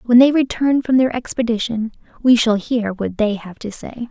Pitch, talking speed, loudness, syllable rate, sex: 235 Hz, 205 wpm, -18 LUFS, 4.9 syllables/s, female